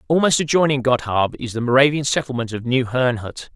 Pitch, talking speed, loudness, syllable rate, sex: 130 Hz, 170 wpm, -19 LUFS, 5.8 syllables/s, male